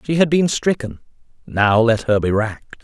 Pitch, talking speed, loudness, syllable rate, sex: 125 Hz, 190 wpm, -18 LUFS, 4.9 syllables/s, male